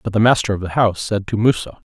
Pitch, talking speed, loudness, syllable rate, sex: 105 Hz, 285 wpm, -18 LUFS, 7.0 syllables/s, male